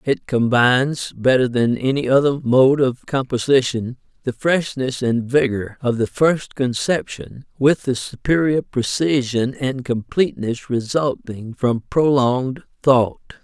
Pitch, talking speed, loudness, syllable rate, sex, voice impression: 130 Hz, 120 wpm, -19 LUFS, 4.0 syllables/s, male, very masculine, very adult-like, very middle-aged, tensed, slightly powerful, bright, hard, slightly muffled, fluent, slightly raspy, cool, slightly intellectual, sincere, very calm, slightly mature, friendly, reassuring, slightly unique, slightly wild, kind, light